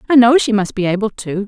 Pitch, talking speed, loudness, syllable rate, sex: 215 Hz, 285 wpm, -15 LUFS, 6.2 syllables/s, female